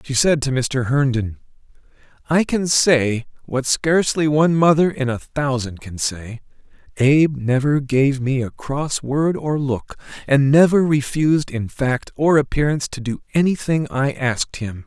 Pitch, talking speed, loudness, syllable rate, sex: 140 Hz, 155 wpm, -19 LUFS, 4.4 syllables/s, male